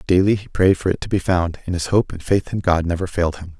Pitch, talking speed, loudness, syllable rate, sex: 90 Hz, 300 wpm, -20 LUFS, 6.3 syllables/s, male